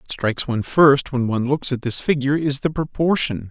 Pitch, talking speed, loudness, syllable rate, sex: 135 Hz, 225 wpm, -20 LUFS, 5.8 syllables/s, male